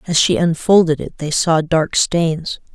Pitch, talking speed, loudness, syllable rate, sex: 165 Hz, 175 wpm, -16 LUFS, 4.1 syllables/s, female